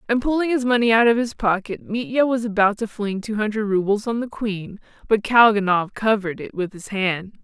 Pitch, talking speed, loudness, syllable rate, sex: 215 Hz, 210 wpm, -20 LUFS, 5.3 syllables/s, female